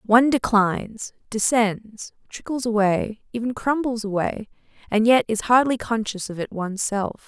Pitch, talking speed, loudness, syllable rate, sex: 225 Hz, 140 wpm, -22 LUFS, 4.6 syllables/s, female